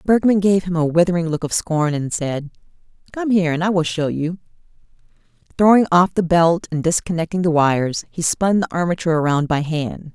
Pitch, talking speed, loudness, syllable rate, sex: 170 Hz, 190 wpm, -18 LUFS, 5.6 syllables/s, female